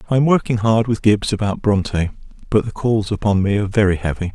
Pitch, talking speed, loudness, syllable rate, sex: 105 Hz, 220 wpm, -18 LUFS, 6.1 syllables/s, male